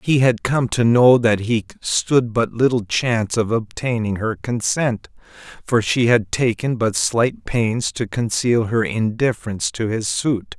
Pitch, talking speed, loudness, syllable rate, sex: 115 Hz, 165 wpm, -19 LUFS, 4.1 syllables/s, male